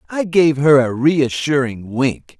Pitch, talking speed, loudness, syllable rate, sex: 155 Hz, 150 wpm, -16 LUFS, 3.7 syllables/s, male